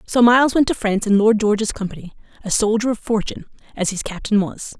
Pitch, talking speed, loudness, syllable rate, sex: 215 Hz, 215 wpm, -18 LUFS, 6.5 syllables/s, female